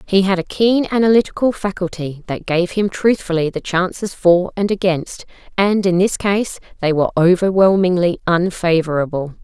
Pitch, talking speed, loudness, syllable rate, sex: 185 Hz, 145 wpm, -17 LUFS, 5.0 syllables/s, female